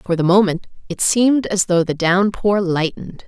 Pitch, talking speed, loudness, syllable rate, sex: 190 Hz, 185 wpm, -17 LUFS, 5.1 syllables/s, female